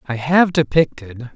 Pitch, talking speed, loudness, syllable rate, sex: 140 Hz, 135 wpm, -16 LUFS, 4.4 syllables/s, male